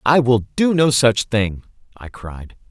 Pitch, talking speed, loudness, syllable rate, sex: 120 Hz, 180 wpm, -17 LUFS, 3.7 syllables/s, male